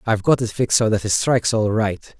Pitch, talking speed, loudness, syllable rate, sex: 110 Hz, 275 wpm, -19 LUFS, 6.3 syllables/s, male